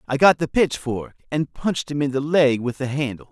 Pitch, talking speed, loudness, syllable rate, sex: 140 Hz, 235 wpm, -21 LUFS, 5.4 syllables/s, male